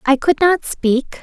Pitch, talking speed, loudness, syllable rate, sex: 290 Hz, 195 wpm, -16 LUFS, 3.6 syllables/s, female